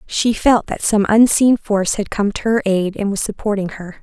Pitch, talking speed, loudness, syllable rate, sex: 205 Hz, 225 wpm, -16 LUFS, 5.0 syllables/s, female